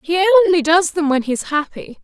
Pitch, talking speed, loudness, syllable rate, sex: 330 Hz, 205 wpm, -15 LUFS, 5.4 syllables/s, female